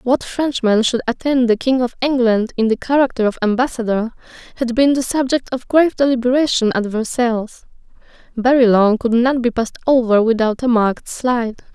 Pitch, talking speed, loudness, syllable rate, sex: 245 Hz, 165 wpm, -16 LUFS, 5.4 syllables/s, female